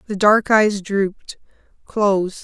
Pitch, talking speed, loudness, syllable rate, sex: 200 Hz, 100 wpm, -17 LUFS, 3.9 syllables/s, female